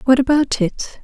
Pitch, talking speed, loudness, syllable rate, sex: 260 Hz, 175 wpm, -17 LUFS, 4.9 syllables/s, female